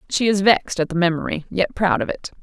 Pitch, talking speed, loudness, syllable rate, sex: 180 Hz, 245 wpm, -20 LUFS, 6.3 syllables/s, female